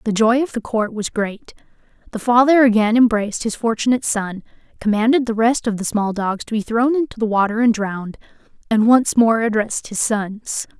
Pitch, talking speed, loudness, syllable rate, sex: 225 Hz, 195 wpm, -18 LUFS, 5.4 syllables/s, female